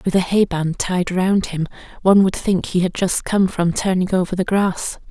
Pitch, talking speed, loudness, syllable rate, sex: 185 Hz, 225 wpm, -19 LUFS, 4.8 syllables/s, female